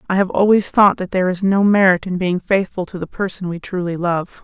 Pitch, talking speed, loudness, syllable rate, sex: 185 Hz, 245 wpm, -17 LUFS, 5.7 syllables/s, female